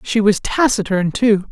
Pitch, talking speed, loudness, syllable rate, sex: 210 Hz, 160 wpm, -16 LUFS, 4.4 syllables/s, male